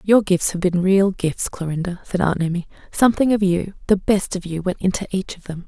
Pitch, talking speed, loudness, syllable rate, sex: 185 Hz, 210 wpm, -20 LUFS, 5.4 syllables/s, female